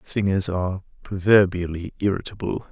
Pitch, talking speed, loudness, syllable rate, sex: 95 Hz, 90 wpm, -22 LUFS, 5.2 syllables/s, male